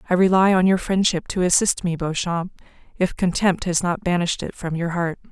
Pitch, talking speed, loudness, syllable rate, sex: 180 Hz, 205 wpm, -21 LUFS, 5.1 syllables/s, female